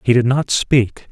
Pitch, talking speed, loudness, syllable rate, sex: 125 Hz, 215 wpm, -16 LUFS, 4.0 syllables/s, male